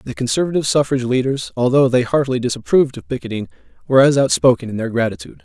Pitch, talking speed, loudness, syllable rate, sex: 130 Hz, 175 wpm, -17 LUFS, 7.6 syllables/s, male